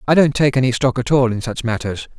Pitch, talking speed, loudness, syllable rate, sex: 125 Hz, 275 wpm, -17 LUFS, 6.1 syllables/s, male